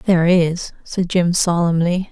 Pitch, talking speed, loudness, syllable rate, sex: 175 Hz, 140 wpm, -17 LUFS, 4.1 syllables/s, female